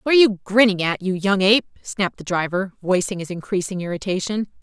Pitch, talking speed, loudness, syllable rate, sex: 190 Hz, 195 wpm, -20 LUFS, 6.2 syllables/s, female